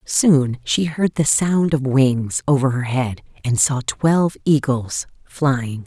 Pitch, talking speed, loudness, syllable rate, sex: 135 Hz, 155 wpm, -19 LUFS, 3.5 syllables/s, female